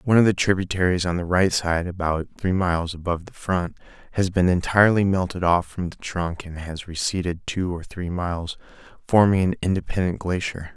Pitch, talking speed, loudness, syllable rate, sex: 90 Hz, 185 wpm, -23 LUFS, 5.4 syllables/s, male